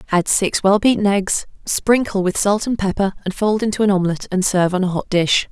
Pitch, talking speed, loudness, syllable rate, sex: 195 Hz, 230 wpm, -18 LUFS, 5.6 syllables/s, female